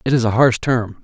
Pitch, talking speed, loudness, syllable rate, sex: 120 Hz, 290 wpm, -16 LUFS, 5.5 syllables/s, male